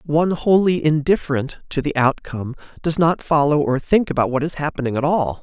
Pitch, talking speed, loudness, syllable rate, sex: 150 Hz, 190 wpm, -19 LUFS, 5.6 syllables/s, male